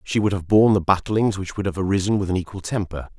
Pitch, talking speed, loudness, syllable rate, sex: 95 Hz, 265 wpm, -21 LUFS, 6.6 syllables/s, male